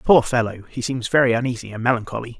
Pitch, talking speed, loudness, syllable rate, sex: 120 Hz, 200 wpm, -21 LUFS, 6.7 syllables/s, male